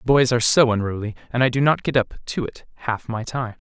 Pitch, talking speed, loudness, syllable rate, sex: 120 Hz, 260 wpm, -21 LUFS, 6.4 syllables/s, male